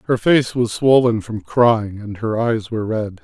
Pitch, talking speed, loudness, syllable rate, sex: 115 Hz, 205 wpm, -18 LUFS, 4.3 syllables/s, male